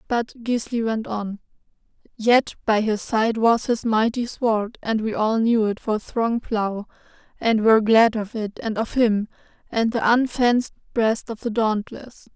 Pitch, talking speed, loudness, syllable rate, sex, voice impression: 225 Hz, 170 wpm, -21 LUFS, 4.1 syllables/s, female, feminine, adult-like, tensed, slightly powerful, bright, soft, clear, friendly, reassuring, lively, sharp